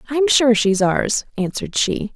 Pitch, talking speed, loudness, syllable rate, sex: 225 Hz, 225 wpm, -18 LUFS, 5.5 syllables/s, female